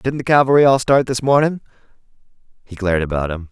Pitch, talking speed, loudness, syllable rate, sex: 120 Hz, 190 wpm, -16 LUFS, 6.6 syllables/s, male